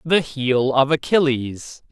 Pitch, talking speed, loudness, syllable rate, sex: 140 Hz, 125 wpm, -19 LUFS, 3.4 syllables/s, male